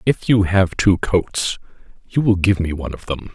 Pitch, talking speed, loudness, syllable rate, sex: 95 Hz, 215 wpm, -18 LUFS, 4.7 syllables/s, male